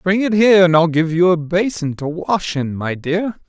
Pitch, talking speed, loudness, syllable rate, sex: 175 Hz, 240 wpm, -16 LUFS, 4.8 syllables/s, male